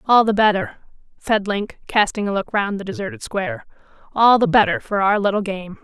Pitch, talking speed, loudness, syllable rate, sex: 205 Hz, 195 wpm, -19 LUFS, 5.5 syllables/s, female